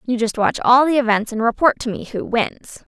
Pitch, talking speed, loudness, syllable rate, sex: 240 Hz, 245 wpm, -18 LUFS, 5.1 syllables/s, female